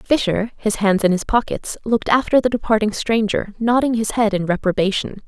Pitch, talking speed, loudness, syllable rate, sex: 215 Hz, 180 wpm, -19 LUFS, 5.4 syllables/s, female